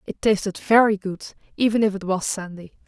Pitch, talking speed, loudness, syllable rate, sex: 200 Hz, 190 wpm, -21 LUFS, 5.3 syllables/s, female